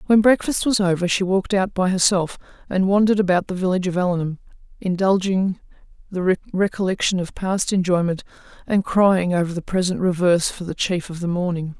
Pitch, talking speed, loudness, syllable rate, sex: 185 Hz, 175 wpm, -20 LUFS, 5.8 syllables/s, female